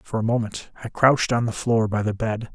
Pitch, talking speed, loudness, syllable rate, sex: 115 Hz, 260 wpm, -22 LUFS, 5.6 syllables/s, male